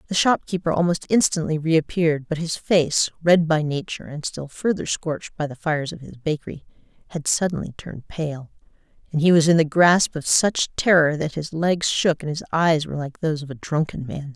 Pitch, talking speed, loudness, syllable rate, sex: 160 Hz, 200 wpm, -21 LUFS, 5.5 syllables/s, female